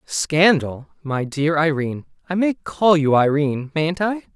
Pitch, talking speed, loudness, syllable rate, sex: 160 Hz, 140 wpm, -19 LUFS, 4.2 syllables/s, male